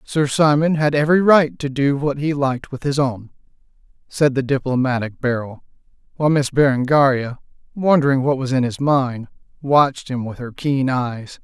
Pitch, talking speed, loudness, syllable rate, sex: 135 Hz, 170 wpm, -18 LUFS, 5.0 syllables/s, male